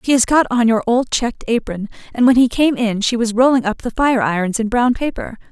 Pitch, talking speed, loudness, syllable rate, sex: 235 Hz, 250 wpm, -16 LUFS, 5.7 syllables/s, female